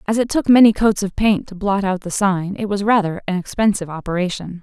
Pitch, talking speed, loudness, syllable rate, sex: 195 Hz, 235 wpm, -18 LUFS, 5.9 syllables/s, female